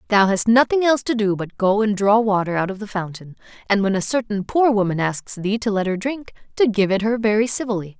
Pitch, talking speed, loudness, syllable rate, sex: 210 Hz, 250 wpm, -19 LUFS, 5.8 syllables/s, female